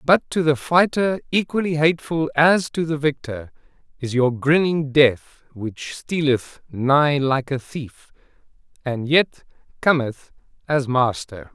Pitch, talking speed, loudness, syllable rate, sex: 145 Hz, 125 wpm, -20 LUFS, 3.8 syllables/s, male